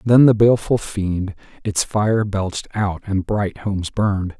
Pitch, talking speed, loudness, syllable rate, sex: 100 Hz, 165 wpm, -19 LUFS, 4.4 syllables/s, male